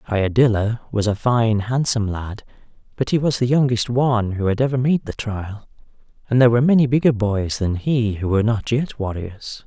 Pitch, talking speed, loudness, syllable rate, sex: 115 Hz, 190 wpm, -19 LUFS, 5.5 syllables/s, male